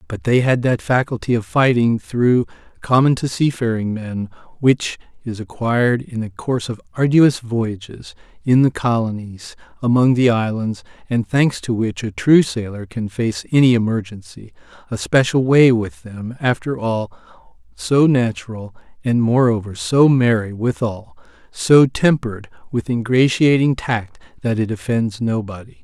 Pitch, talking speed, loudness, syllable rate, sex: 120 Hz, 140 wpm, -18 LUFS, 4.4 syllables/s, male